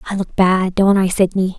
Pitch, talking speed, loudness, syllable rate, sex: 190 Hz, 225 wpm, -15 LUFS, 5.1 syllables/s, female